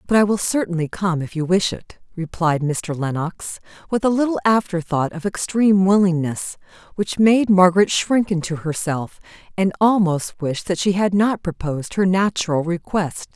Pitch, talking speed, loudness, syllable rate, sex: 180 Hz, 160 wpm, -19 LUFS, 4.8 syllables/s, female